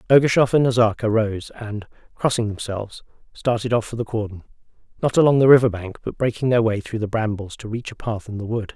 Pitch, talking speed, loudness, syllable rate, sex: 115 Hz, 200 wpm, -21 LUFS, 6.0 syllables/s, male